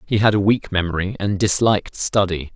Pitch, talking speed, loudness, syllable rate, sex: 100 Hz, 190 wpm, -19 LUFS, 5.5 syllables/s, male